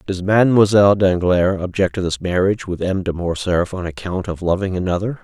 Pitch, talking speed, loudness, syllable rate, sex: 95 Hz, 185 wpm, -18 LUFS, 5.7 syllables/s, male